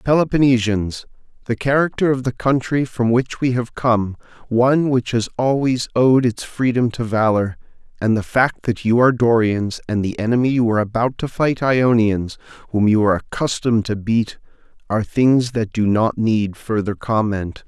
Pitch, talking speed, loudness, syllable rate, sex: 115 Hz, 170 wpm, -18 LUFS, 4.9 syllables/s, male